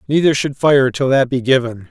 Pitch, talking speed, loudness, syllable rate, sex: 130 Hz, 220 wpm, -15 LUFS, 5.2 syllables/s, male